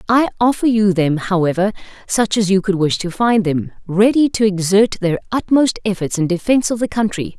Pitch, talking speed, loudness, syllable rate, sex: 200 Hz, 195 wpm, -16 LUFS, 5.3 syllables/s, female